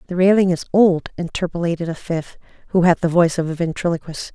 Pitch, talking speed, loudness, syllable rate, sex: 175 Hz, 195 wpm, -19 LUFS, 6.3 syllables/s, female